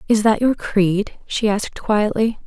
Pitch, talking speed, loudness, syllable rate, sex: 215 Hz, 170 wpm, -19 LUFS, 4.1 syllables/s, female